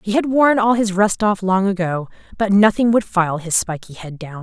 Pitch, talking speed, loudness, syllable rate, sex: 200 Hz, 230 wpm, -17 LUFS, 4.9 syllables/s, female